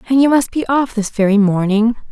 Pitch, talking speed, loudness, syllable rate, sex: 230 Hz, 225 wpm, -15 LUFS, 5.5 syllables/s, female